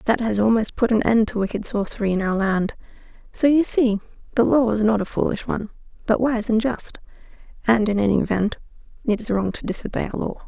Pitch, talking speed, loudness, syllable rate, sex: 220 Hz, 210 wpm, -21 LUFS, 6.0 syllables/s, female